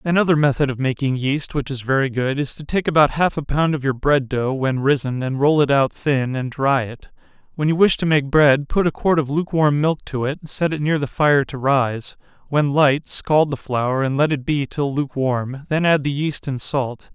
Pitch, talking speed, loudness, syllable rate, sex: 140 Hz, 230 wpm, -19 LUFS, 4.9 syllables/s, male